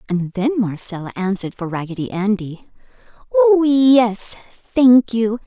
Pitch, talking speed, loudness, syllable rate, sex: 210 Hz, 120 wpm, -17 LUFS, 4.3 syllables/s, female